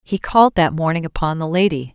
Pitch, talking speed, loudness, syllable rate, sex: 170 Hz, 215 wpm, -17 LUFS, 6.0 syllables/s, female